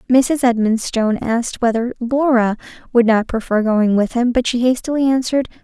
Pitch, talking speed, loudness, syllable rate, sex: 240 Hz, 160 wpm, -17 LUFS, 5.3 syllables/s, female